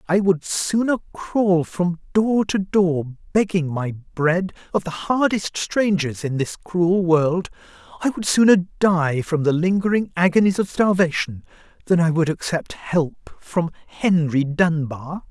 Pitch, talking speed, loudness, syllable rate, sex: 175 Hz, 135 wpm, -20 LUFS, 3.9 syllables/s, male